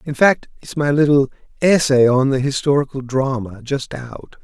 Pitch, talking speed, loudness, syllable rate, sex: 135 Hz, 160 wpm, -17 LUFS, 4.6 syllables/s, male